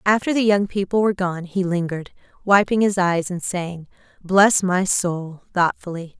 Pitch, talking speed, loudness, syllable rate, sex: 185 Hz, 165 wpm, -20 LUFS, 4.7 syllables/s, female